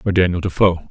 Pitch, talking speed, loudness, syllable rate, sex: 90 Hz, 200 wpm, -17 LUFS, 6.3 syllables/s, male